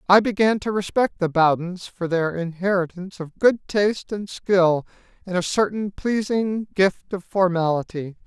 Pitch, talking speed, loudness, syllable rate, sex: 190 Hz, 150 wpm, -22 LUFS, 4.5 syllables/s, male